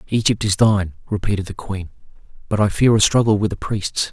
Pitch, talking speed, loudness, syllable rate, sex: 105 Hz, 205 wpm, -19 LUFS, 5.9 syllables/s, male